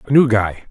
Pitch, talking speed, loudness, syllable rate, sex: 115 Hz, 255 wpm, -15 LUFS, 4.9 syllables/s, male